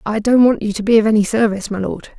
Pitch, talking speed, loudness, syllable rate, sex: 215 Hz, 300 wpm, -15 LUFS, 6.7 syllables/s, female